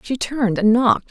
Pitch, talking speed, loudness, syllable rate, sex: 235 Hz, 220 wpm, -18 LUFS, 5.9 syllables/s, female